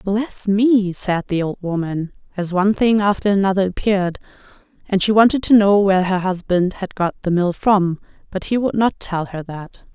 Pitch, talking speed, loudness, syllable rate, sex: 195 Hz, 195 wpm, -18 LUFS, 5.0 syllables/s, female